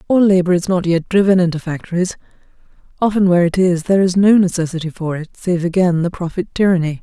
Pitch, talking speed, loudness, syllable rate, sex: 180 Hz, 195 wpm, -16 LUFS, 6.4 syllables/s, female